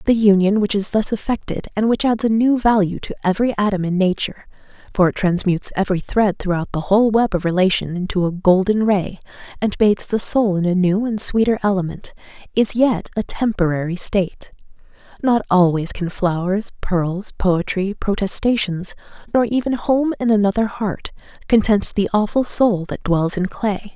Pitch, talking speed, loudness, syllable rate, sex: 200 Hz, 165 wpm, -18 LUFS, 5.2 syllables/s, female